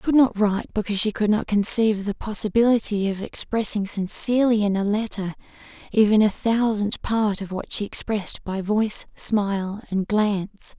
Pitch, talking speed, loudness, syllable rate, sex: 210 Hz, 165 wpm, -22 LUFS, 5.3 syllables/s, female